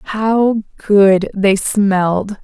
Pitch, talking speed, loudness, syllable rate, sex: 200 Hz, 100 wpm, -14 LUFS, 2.4 syllables/s, female